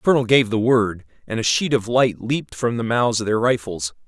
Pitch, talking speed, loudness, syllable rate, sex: 115 Hz, 250 wpm, -20 LUFS, 5.8 syllables/s, male